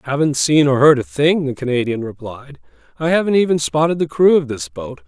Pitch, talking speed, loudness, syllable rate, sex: 150 Hz, 215 wpm, -16 LUFS, 5.6 syllables/s, male